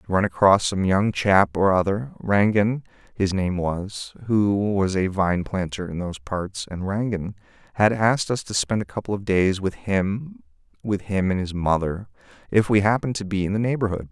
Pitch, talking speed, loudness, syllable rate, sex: 100 Hz, 185 wpm, -22 LUFS, 4.9 syllables/s, male